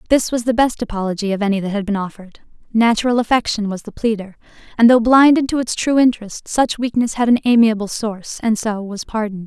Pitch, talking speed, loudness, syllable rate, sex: 225 Hz, 210 wpm, -17 LUFS, 6.3 syllables/s, female